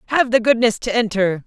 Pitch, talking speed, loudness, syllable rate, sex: 225 Hz, 205 wpm, -17 LUFS, 5.7 syllables/s, female